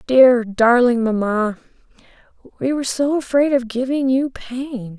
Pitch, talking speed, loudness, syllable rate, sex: 250 Hz, 130 wpm, -18 LUFS, 4.2 syllables/s, female